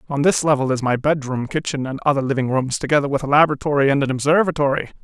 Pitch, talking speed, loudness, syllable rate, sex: 140 Hz, 215 wpm, -19 LUFS, 7.0 syllables/s, male